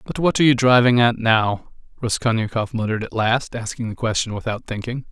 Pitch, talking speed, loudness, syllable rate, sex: 115 Hz, 190 wpm, -20 LUFS, 5.8 syllables/s, male